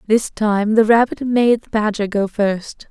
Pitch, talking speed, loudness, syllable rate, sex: 215 Hz, 185 wpm, -17 LUFS, 4.0 syllables/s, female